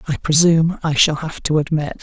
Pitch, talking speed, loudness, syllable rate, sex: 155 Hz, 205 wpm, -16 LUFS, 5.5 syllables/s, male